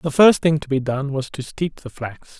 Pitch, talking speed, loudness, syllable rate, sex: 140 Hz, 275 wpm, -20 LUFS, 4.7 syllables/s, male